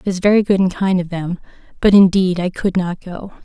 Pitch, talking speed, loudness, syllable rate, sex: 185 Hz, 245 wpm, -16 LUFS, 5.5 syllables/s, female